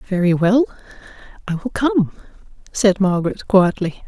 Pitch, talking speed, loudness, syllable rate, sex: 200 Hz, 120 wpm, -18 LUFS, 4.8 syllables/s, female